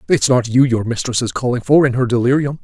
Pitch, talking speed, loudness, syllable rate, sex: 125 Hz, 250 wpm, -16 LUFS, 6.2 syllables/s, male